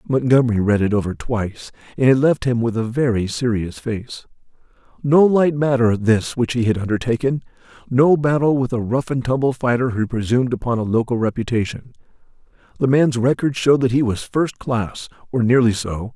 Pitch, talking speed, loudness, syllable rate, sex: 120 Hz, 170 wpm, -19 LUFS, 5.4 syllables/s, male